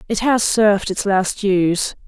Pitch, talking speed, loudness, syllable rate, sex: 200 Hz, 175 wpm, -17 LUFS, 4.4 syllables/s, female